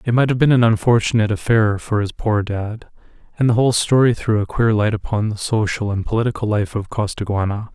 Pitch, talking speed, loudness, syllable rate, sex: 110 Hz, 210 wpm, -18 LUFS, 5.9 syllables/s, male